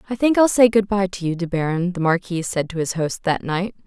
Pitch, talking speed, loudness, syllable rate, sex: 185 Hz, 280 wpm, -20 LUFS, 5.6 syllables/s, female